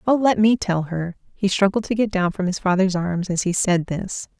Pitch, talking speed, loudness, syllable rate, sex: 190 Hz, 245 wpm, -21 LUFS, 5.0 syllables/s, female